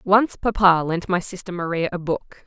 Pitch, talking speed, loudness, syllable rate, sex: 180 Hz, 195 wpm, -21 LUFS, 4.8 syllables/s, female